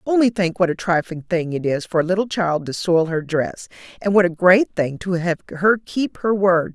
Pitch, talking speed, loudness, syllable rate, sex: 180 Hz, 240 wpm, -19 LUFS, 4.9 syllables/s, female